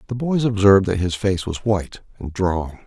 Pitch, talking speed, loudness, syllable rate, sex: 100 Hz, 210 wpm, -19 LUFS, 5.4 syllables/s, male